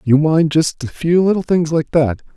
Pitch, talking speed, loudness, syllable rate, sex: 155 Hz, 230 wpm, -16 LUFS, 4.8 syllables/s, male